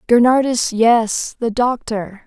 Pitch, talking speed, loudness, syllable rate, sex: 235 Hz, 105 wpm, -16 LUFS, 3.4 syllables/s, female